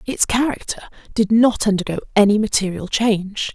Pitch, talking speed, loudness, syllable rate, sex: 210 Hz, 135 wpm, -18 LUFS, 5.4 syllables/s, female